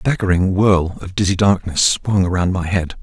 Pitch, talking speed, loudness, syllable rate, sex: 95 Hz, 200 wpm, -17 LUFS, 5.0 syllables/s, male